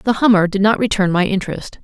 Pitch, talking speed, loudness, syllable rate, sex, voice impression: 205 Hz, 230 wpm, -15 LUFS, 6.2 syllables/s, female, very feminine, slightly gender-neutral, adult-like, tensed, powerful, bright, slightly hard, very clear, very fluent, slightly raspy, slightly cute, slightly cool, sincere, slightly calm, slightly friendly, slightly reassuring, unique, slightly elegant, lively, strict, slightly intense, slightly sharp